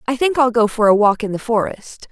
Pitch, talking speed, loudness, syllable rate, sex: 230 Hz, 285 wpm, -16 LUFS, 5.6 syllables/s, female